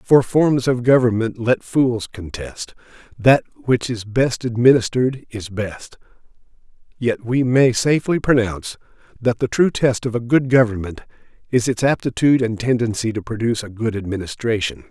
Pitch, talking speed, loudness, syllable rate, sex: 120 Hz, 140 wpm, -19 LUFS, 5.1 syllables/s, male